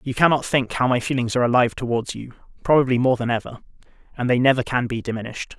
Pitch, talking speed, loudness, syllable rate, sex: 125 Hz, 215 wpm, -21 LUFS, 7.1 syllables/s, male